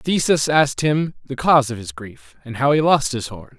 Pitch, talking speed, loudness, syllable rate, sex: 140 Hz, 235 wpm, -18 LUFS, 5.1 syllables/s, male